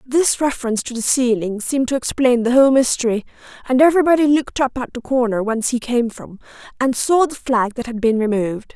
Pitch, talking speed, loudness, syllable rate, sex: 250 Hz, 205 wpm, -18 LUFS, 6.1 syllables/s, female